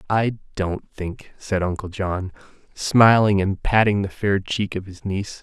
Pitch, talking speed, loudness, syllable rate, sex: 100 Hz, 165 wpm, -21 LUFS, 4.2 syllables/s, male